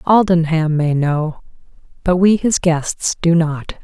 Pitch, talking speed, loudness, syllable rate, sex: 165 Hz, 140 wpm, -16 LUFS, 3.6 syllables/s, female